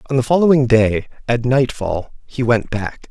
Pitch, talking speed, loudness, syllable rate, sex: 120 Hz, 175 wpm, -17 LUFS, 4.6 syllables/s, male